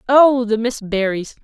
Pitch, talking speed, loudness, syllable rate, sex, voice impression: 230 Hz, 165 wpm, -17 LUFS, 4.2 syllables/s, female, very feminine, adult-like, slightly middle-aged, very thin, very tensed, very powerful, very bright, hard, very clear, fluent, slightly cute, cool, very intellectual, refreshing, very sincere, very calm, friendly, reassuring, unique, wild, slightly sweet, very lively, strict, intense, sharp